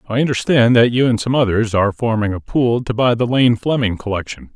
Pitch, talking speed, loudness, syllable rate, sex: 115 Hz, 225 wpm, -16 LUFS, 5.8 syllables/s, male